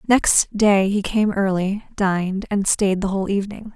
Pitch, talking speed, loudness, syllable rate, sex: 200 Hz, 175 wpm, -19 LUFS, 4.7 syllables/s, female